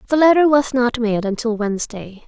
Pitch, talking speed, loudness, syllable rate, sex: 240 Hz, 185 wpm, -17 LUFS, 5.9 syllables/s, female